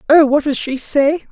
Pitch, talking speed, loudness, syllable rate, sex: 290 Hz, 230 wpm, -15 LUFS, 4.6 syllables/s, female